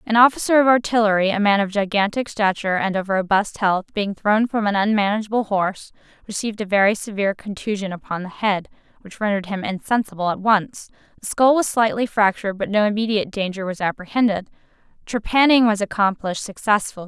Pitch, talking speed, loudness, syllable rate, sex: 205 Hz, 170 wpm, -20 LUFS, 6.1 syllables/s, female